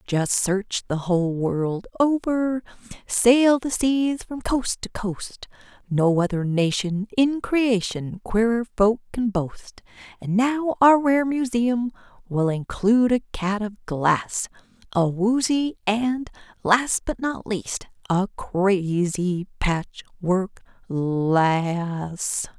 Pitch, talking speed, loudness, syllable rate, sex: 210 Hz, 110 wpm, -23 LUFS, 3.1 syllables/s, female